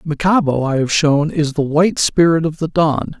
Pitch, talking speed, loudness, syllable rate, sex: 155 Hz, 205 wpm, -15 LUFS, 4.8 syllables/s, male